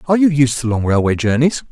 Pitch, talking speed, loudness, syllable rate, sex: 135 Hz, 245 wpm, -15 LUFS, 6.3 syllables/s, male